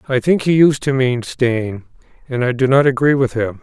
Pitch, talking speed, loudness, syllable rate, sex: 130 Hz, 230 wpm, -16 LUFS, 5.0 syllables/s, male